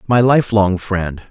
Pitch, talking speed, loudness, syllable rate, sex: 105 Hz, 140 wpm, -15 LUFS, 3.5 syllables/s, male